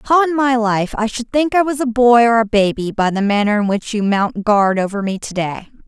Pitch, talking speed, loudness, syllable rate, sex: 225 Hz, 245 wpm, -16 LUFS, 5.2 syllables/s, female